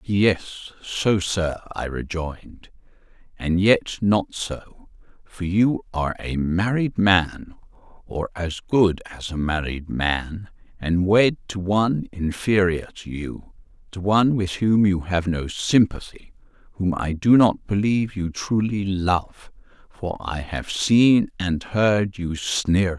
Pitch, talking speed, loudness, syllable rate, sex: 95 Hz, 135 wpm, -22 LUFS, 3.6 syllables/s, male